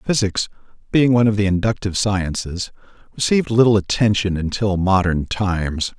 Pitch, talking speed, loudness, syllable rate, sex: 100 Hz, 130 wpm, -19 LUFS, 5.4 syllables/s, male